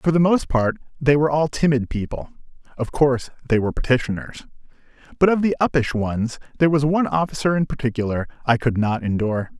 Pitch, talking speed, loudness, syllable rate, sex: 135 Hz, 175 wpm, -21 LUFS, 6.3 syllables/s, male